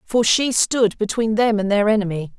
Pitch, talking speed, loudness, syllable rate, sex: 215 Hz, 200 wpm, -18 LUFS, 4.9 syllables/s, female